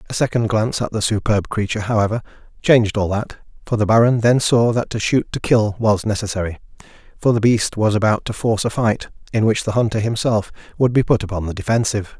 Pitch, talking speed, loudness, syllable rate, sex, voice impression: 110 Hz, 210 wpm, -18 LUFS, 6.2 syllables/s, male, very masculine, very adult-like, middle-aged, very thick, slightly relaxed, slightly weak, very hard, slightly clear, very fluent, cool, very intellectual, slightly refreshing, very sincere, very calm, mature, slightly friendly, reassuring, unique, elegant, wild, slightly sweet, kind, slightly modest